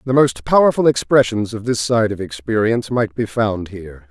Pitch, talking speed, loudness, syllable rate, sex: 110 Hz, 190 wpm, -17 LUFS, 5.3 syllables/s, male